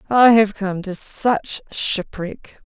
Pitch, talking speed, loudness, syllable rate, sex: 205 Hz, 135 wpm, -19 LUFS, 3.0 syllables/s, female